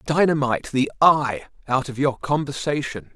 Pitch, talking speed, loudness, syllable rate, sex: 140 Hz, 135 wpm, -21 LUFS, 4.9 syllables/s, male